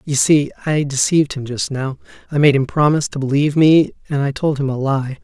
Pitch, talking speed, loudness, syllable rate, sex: 140 Hz, 230 wpm, -17 LUFS, 5.8 syllables/s, male